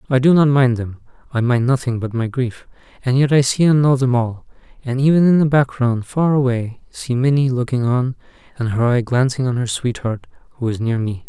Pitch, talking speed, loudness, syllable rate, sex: 125 Hz, 205 wpm, -17 LUFS, 5.3 syllables/s, male